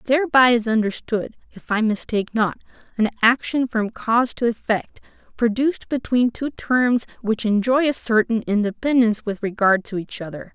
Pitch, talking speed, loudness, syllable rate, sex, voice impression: 230 Hz, 155 wpm, -20 LUFS, 5.0 syllables/s, female, very feminine, slightly young, thin, tensed, slightly powerful, very bright, slightly hard, very clear, very fluent, cool, very intellectual, very refreshing, sincere, very calm, very friendly, very reassuring, unique, very elegant, slightly wild, sweet, very lively, very kind, slightly intense, slightly sharp